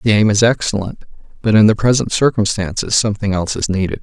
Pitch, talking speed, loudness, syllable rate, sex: 105 Hz, 195 wpm, -15 LUFS, 6.4 syllables/s, male